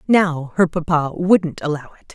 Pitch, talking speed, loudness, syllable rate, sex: 165 Hz, 170 wpm, -19 LUFS, 4.3 syllables/s, female